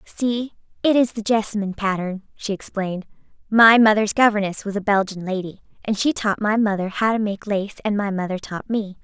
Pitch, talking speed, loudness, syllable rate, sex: 205 Hz, 195 wpm, -20 LUFS, 5.7 syllables/s, female